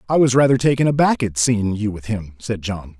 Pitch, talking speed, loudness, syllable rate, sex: 115 Hz, 240 wpm, -18 LUFS, 5.4 syllables/s, male